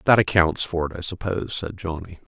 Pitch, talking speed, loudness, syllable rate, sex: 90 Hz, 205 wpm, -23 LUFS, 5.9 syllables/s, male